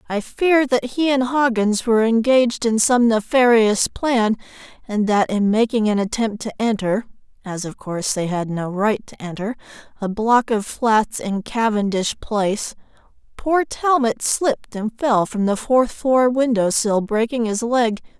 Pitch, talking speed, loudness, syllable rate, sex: 225 Hz, 160 wpm, -19 LUFS, 4.3 syllables/s, female